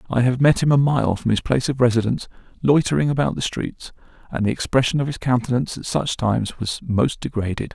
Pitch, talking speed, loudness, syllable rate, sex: 125 Hz, 210 wpm, -20 LUFS, 6.2 syllables/s, male